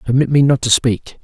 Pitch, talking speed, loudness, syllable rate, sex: 125 Hz, 240 wpm, -14 LUFS, 5.5 syllables/s, male